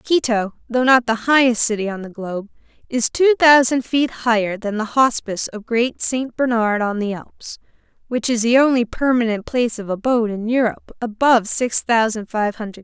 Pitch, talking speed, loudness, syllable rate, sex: 230 Hz, 185 wpm, -18 LUFS, 5.2 syllables/s, female